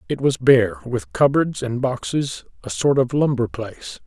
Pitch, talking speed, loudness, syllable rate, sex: 130 Hz, 175 wpm, -20 LUFS, 4.5 syllables/s, male